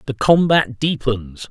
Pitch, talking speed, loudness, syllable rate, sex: 130 Hz, 120 wpm, -17 LUFS, 3.7 syllables/s, male